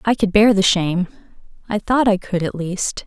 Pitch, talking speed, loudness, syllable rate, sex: 195 Hz, 195 wpm, -18 LUFS, 5.1 syllables/s, female